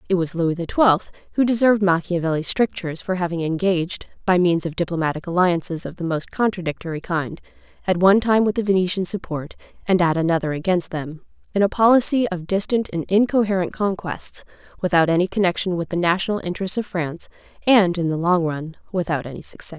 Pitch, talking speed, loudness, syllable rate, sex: 180 Hz, 180 wpm, -21 LUFS, 6.0 syllables/s, female